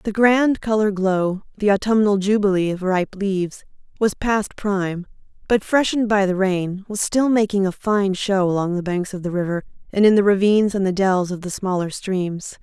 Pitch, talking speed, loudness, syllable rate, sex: 195 Hz, 185 wpm, -20 LUFS, 5.0 syllables/s, female